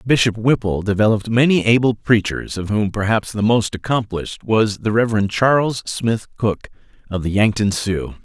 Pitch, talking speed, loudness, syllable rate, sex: 110 Hz, 160 wpm, -18 LUFS, 5.1 syllables/s, male